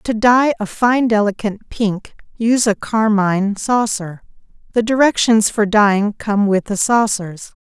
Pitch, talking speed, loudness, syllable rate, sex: 215 Hz, 135 wpm, -16 LUFS, 4.2 syllables/s, female